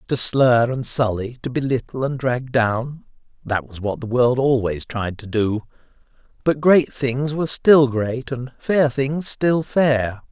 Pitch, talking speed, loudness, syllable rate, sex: 125 Hz, 165 wpm, -20 LUFS, 3.9 syllables/s, male